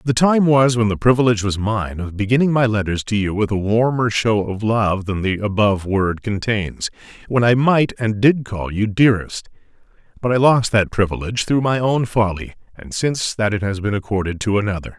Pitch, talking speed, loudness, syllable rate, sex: 110 Hz, 200 wpm, -18 LUFS, 5.3 syllables/s, male